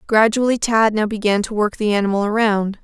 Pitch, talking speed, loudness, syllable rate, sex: 215 Hz, 190 wpm, -17 LUFS, 5.6 syllables/s, female